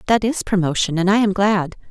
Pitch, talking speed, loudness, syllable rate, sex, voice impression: 195 Hz, 220 wpm, -18 LUFS, 5.6 syllables/s, female, feminine, very adult-like, sincere, slightly calm